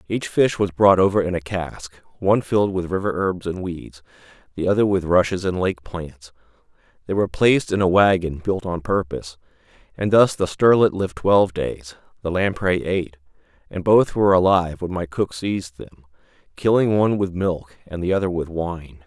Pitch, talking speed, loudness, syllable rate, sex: 90 Hz, 180 wpm, -20 LUFS, 5.3 syllables/s, male